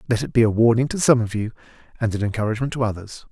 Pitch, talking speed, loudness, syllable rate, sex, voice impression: 115 Hz, 255 wpm, -21 LUFS, 7.6 syllables/s, male, very masculine, slightly old, very thick, tensed, powerful, bright, slightly soft, slightly muffled, fluent, raspy, cool, intellectual, slightly refreshing, sincere, calm, mature, friendly, reassuring, unique, elegant, wild, slightly sweet, lively, slightly strict, slightly intense, slightly modest